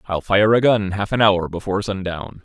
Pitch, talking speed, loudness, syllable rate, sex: 100 Hz, 220 wpm, -18 LUFS, 5.2 syllables/s, male